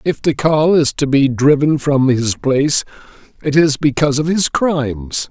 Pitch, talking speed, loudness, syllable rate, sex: 145 Hz, 170 wpm, -15 LUFS, 4.6 syllables/s, male